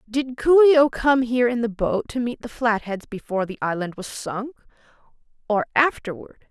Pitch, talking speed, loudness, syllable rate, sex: 235 Hz, 185 wpm, -21 LUFS, 5.3 syllables/s, female